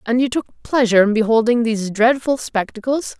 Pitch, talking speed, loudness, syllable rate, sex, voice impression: 235 Hz, 170 wpm, -17 LUFS, 5.5 syllables/s, female, feminine, adult-like, tensed, bright, clear, slightly halting, intellectual, calm, friendly, slightly reassuring, lively, kind